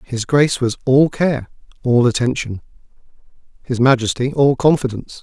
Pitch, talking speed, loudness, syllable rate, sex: 130 Hz, 115 wpm, -17 LUFS, 5.1 syllables/s, male